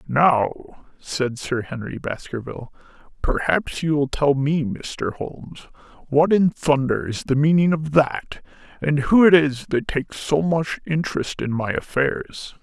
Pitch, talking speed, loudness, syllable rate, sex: 140 Hz, 150 wpm, -21 LUFS, 4.2 syllables/s, male